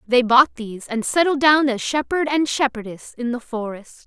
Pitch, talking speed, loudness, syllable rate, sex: 255 Hz, 190 wpm, -19 LUFS, 4.9 syllables/s, female